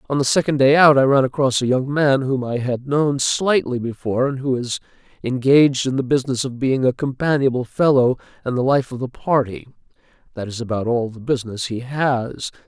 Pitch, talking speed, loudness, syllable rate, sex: 130 Hz, 205 wpm, -19 LUFS, 5.5 syllables/s, male